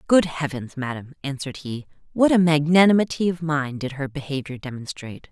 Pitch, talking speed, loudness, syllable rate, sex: 150 Hz, 160 wpm, -22 LUFS, 5.6 syllables/s, female